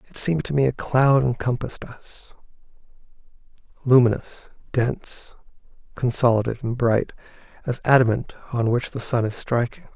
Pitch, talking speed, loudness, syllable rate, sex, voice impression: 125 Hz, 125 wpm, -22 LUFS, 5.2 syllables/s, male, masculine, adult-like, relaxed, weak, slightly dark, soft, muffled, slightly raspy, sincere, calm, wild, modest